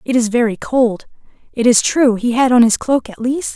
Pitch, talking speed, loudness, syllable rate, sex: 240 Hz, 235 wpm, -15 LUFS, 5.0 syllables/s, female